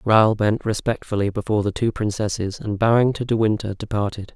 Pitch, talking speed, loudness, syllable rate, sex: 105 Hz, 180 wpm, -21 LUFS, 5.7 syllables/s, male